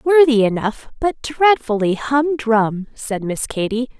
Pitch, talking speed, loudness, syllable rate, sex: 245 Hz, 120 wpm, -18 LUFS, 3.8 syllables/s, female